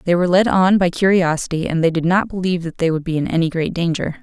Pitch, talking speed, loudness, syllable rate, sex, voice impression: 175 Hz, 270 wpm, -17 LUFS, 6.6 syllables/s, female, feminine, adult-like, slightly fluent, slightly intellectual, elegant